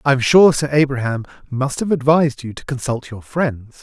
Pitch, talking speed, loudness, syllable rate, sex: 135 Hz, 190 wpm, -17 LUFS, 4.9 syllables/s, male